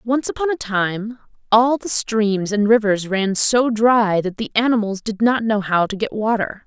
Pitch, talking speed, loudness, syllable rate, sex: 220 Hz, 200 wpm, -18 LUFS, 4.4 syllables/s, female